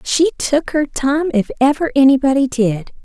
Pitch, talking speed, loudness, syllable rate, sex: 275 Hz, 160 wpm, -15 LUFS, 4.6 syllables/s, female